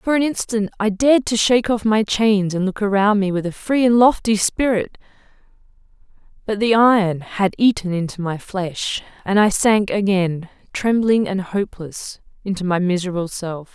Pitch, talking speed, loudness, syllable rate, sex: 205 Hz, 170 wpm, -18 LUFS, 4.9 syllables/s, female